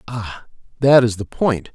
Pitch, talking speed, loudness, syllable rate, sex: 115 Hz, 170 wpm, -17 LUFS, 3.9 syllables/s, male